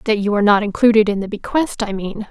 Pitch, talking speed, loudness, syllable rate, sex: 210 Hz, 260 wpm, -17 LUFS, 6.5 syllables/s, female